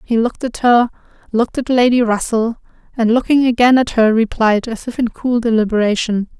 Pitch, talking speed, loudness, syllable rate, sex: 235 Hz, 180 wpm, -15 LUFS, 5.5 syllables/s, female